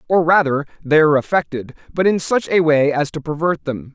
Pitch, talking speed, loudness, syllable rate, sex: 155 Hz, 215 wpm, -17 LUFS, 5.5 syllables/s, male